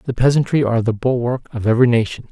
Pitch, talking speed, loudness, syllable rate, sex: 120 Hz, 205 wpm, -17 LUFS, 7.2 syllables/s, male